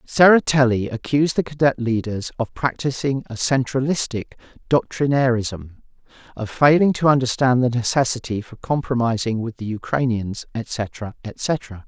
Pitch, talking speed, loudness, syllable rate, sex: 125 Hz, 115 wpm, -20 LUFS, 4.7 syllables/s, male